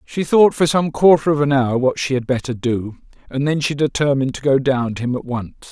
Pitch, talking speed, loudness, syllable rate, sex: 140 Hz, 250 wpm, -17 LUFS, 5.7 syllables/s, male